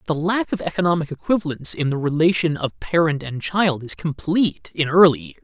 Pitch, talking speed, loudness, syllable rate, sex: 155 Hz, 190 wpm, -20 LUFS, 5.8 syllables/s, male